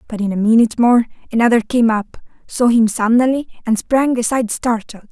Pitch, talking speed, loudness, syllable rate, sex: 230 Hz, 175 wpm, -16 LUFS, 5.7 syllables/s, female